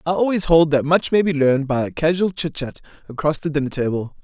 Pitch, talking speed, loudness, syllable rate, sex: 155 Hz, 225 wpm, -19 LUFS, 5.8 syllables/s, male